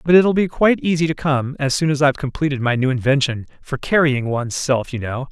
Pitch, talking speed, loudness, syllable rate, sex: 140 Hz, 225 wpm, -18 LUFS, 6.0 syllables/s, male